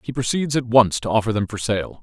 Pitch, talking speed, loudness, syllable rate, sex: 115 Hz, 265 wpm, -20 LUFS, 5.7 syllables/s, male